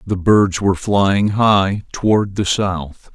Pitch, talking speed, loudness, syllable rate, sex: 100 Hz, 155 wpm, -16 LUFS, 3.4 syllables/s, male